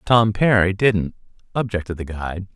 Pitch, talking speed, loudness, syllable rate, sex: 100 Hz, 140 wpm, -20 LUFS, 5.0 syllables/s, male